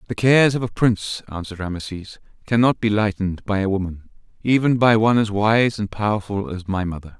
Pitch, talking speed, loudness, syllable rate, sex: 105 Hz, 190 wpm, -20 LUFS, 6.0 syllables/s, male